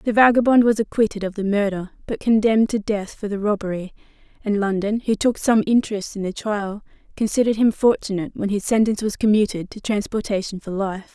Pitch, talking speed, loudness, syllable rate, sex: 210 Hz, 190 wpm, -21 LUFS, 6.0 syllables/s, female